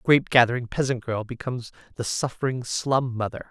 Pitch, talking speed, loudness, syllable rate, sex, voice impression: 125 Hz, 170 wpm, -25 LUFS, 6.1 syllables/s, male, masculine, adult-like, tensed, slightly powerful, bright, clear, intellectual, friendly, reassuring, lively, kind